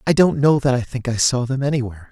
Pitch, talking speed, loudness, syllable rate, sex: 130 Hz, 285 wpm, -18 LUFS, 6.5 syllables/s, male